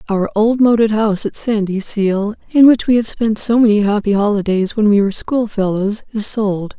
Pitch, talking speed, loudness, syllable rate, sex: 210 Hz, 185 wpm, -15 LUFS, 5.1 syllables/s, female